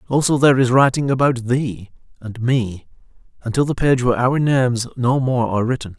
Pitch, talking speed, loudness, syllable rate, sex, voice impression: 125 Hz, 180 wpm, -18 LUFS, 5.5 syllables/s, male, masculine, middle-aged, tensed, powerful, slightly muffled, slightly raspy, cool, intellectual, mature, slightly friendly, wild, slightly strict, slightly intense